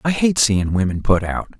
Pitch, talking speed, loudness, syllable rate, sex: 115 Hz, 225 wpm, -18 LUFS, 5.0 syllables/s, male